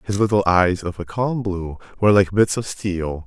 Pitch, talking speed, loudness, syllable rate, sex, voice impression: 100 Hz, 220 wpm, -20 LUFS, 4.8 syllables/s, male, masculine, adult-like, tensed, soft, fluent, cool, sincere, calm, wild, kind